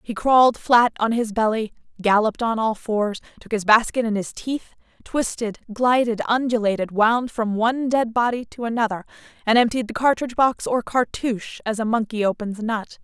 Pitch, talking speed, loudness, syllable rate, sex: 225 Hz, 180 wpm, -21 LUFS, 5.3 syllables/s, female